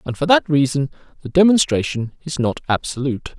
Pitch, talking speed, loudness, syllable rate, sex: 145 Hz, 160 wpm, -18 LUFS, 5.7 syllables/s, male